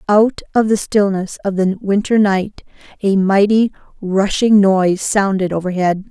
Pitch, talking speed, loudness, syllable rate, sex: 200 Hz, 140 wpm, -15 LUFS, 4.4 syllables/s, female